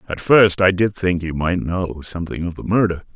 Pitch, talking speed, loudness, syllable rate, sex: 90 Hz, 230 wpm, -18 LUFS, 5.2 syllables/s, male